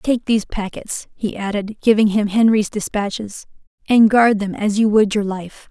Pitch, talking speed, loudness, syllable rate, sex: 210 Hz, 180 wpm, -17 LUFS, 4.7 syllables/s, female